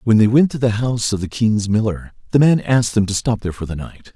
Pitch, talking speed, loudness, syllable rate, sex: 115 Hz, 290 wpm, -17 LUFS, 6.2 syllables/s, male